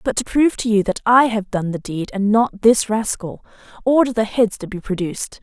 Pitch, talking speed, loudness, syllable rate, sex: 215 Hz, 230 wpm, -18 LUFS, 5.4 syllables/s, female